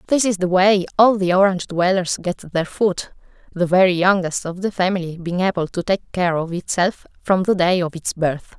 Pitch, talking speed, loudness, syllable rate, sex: 185 Hz, 210 wpm, -19 LUFS, 5.1 syllables/s, female